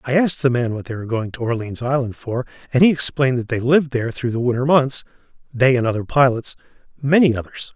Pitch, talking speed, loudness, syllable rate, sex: 130 Hz, 215 wpm, -19 LUFS, 6.4 syllables/s, male